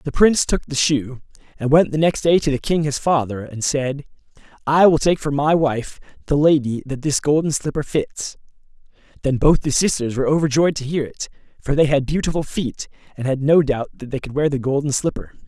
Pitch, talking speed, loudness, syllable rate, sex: 145 Hz, 215 wpm, -19 LUFS, 5.4 syllables/s, male